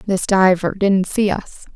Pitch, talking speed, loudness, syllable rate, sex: 190 Hz, 170 wpm, -17 LUFS, 3.7 syllables/s, female